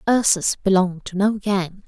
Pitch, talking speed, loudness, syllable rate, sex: 195 Hz, 160 wpm, -20 LUFS, 5.0 syllables/s, female